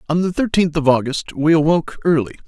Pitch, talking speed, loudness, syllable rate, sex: 160 Hz, 195 wpm, -17 LUFS, 6.1 syllables/s, male